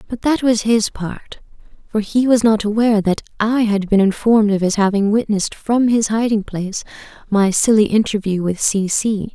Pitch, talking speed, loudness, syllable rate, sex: 215 Hz, 185 wpm, -17 LUFS, 5.1 syllables/s, female